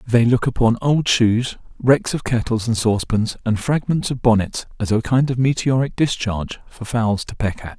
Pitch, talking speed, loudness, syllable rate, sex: 120 Hz, 195 wpm, -19 LUFS, 4.9 syllables/s, male